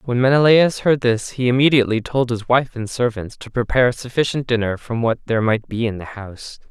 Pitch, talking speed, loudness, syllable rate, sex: 120 Hz, 215 wpm, -18 LUFS, 5.9 syllables/s, male